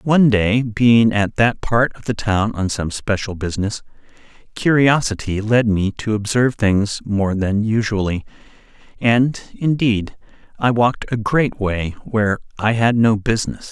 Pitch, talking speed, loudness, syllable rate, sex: 110 Hz, 150 wpm, -18 LUFS, 4.4 syllables/s, male